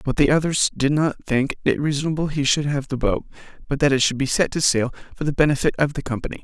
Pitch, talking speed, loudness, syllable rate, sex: 140 Hz, 250 wpm, -21 LUFS, 6.3 syllables/s, male